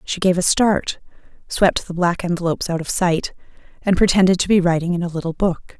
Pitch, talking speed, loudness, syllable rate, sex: 180 Hz, 205 wpm, -19 LUFS, 5.6 syllables/s, female